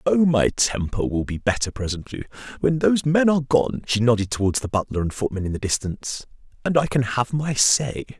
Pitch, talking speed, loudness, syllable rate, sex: 125 Hz, 190 wpm, -22 LUFS, 5.7 syllables/s, male